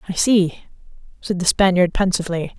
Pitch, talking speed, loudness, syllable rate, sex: 185 Hz, 140 wpm, -18 LUFS, 5.4 syllables/s, female